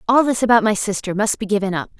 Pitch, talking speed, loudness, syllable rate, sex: 210 Hz, 270 wpm, -18 LUFS, 6.7 syllables/s, female